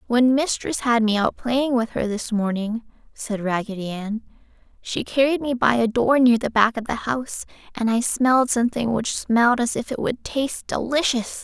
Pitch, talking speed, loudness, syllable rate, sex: 235 Hz, 195 wpm, -21 LUFS, 5.0 syllables/s, female